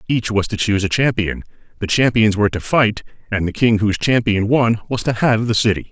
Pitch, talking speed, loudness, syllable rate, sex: 110 Hz, 225 wpm, -17 LUFS, 5.8 syllables/s, male